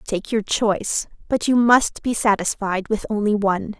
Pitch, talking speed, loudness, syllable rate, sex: 210 Hz, 175 wpm, -20 LUFS, 4.6 syllables/s, female